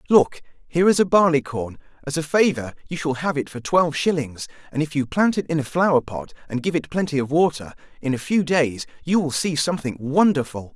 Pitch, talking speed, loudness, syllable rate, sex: 150 Hz, 225 wpm, -21 LUFS, 5.8 syllables/s, male